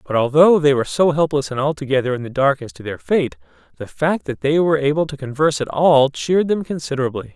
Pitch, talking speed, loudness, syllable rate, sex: 140 Hz, 230 wpm, -18 LUFS, 6.3 syllables/s, male